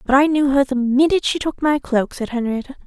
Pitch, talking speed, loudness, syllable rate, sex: 270 Hz, 250 wpm, -18 LUFS, 6.0 syllables/s, female